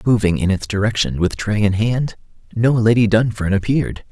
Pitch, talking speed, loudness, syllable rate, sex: 110 Hz, 175 wpm, -17 LUFS, 5.3 syllables/s, male